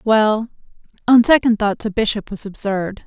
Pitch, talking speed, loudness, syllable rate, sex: 215 Hz, 155 wpm, -17 LUFS, 4.6 syllables/s, female